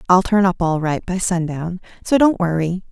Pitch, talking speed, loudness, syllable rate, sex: 180 Hz, 205 wpm, -18 LUFS, 4.9 syllables/s, female